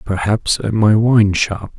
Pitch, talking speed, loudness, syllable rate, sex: 105 Hz, 170 wpm, -15 LUFS, 3.6 syllables/s, male